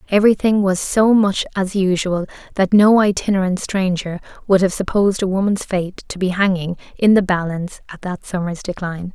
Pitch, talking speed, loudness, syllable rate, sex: 190 Hz, 170 wpm, -18 LUFS, 5.4 syllables/s, female